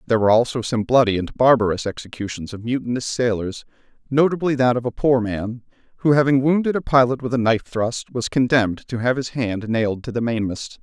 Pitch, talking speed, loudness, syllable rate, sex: 120 Hz, 200 wpm, -20 LUFS, 5.9 syllables/s, male